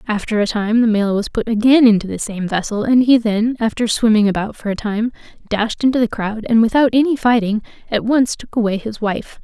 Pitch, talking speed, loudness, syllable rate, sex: 225 Hz, 225 wpm, -16 LUFS, 5.5 syllables/s, female